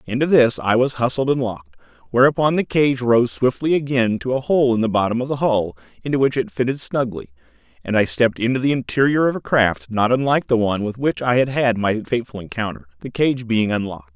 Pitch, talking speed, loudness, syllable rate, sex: 120 Hz, 220 wpm, -19 LUFS, 6.0 syllables/s, male